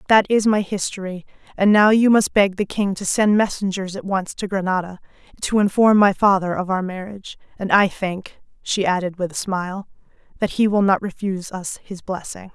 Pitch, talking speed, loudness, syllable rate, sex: 195 Hz, 195 wpm, -19 LUFS, 5.3 syllables/s, female